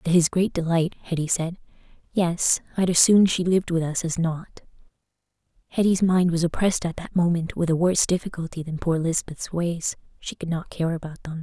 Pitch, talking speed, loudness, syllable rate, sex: 170 Hz, 195 wpm, -23 LUFS, 5.4 syllables/s, female